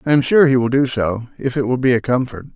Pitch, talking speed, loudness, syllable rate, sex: 125 Hz, 305 wpm, -17 LUFS, 6.2 syllables/s, male